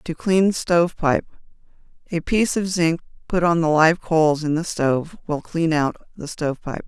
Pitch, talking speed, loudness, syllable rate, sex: 165 Hz, 165 wpm, -20 LUFS, 5.3 syllables/s, female